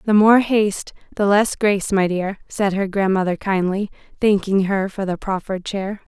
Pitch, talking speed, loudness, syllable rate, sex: 195 Hz, 175 wpm, -19 LUFS, 4.9 syllables/s, female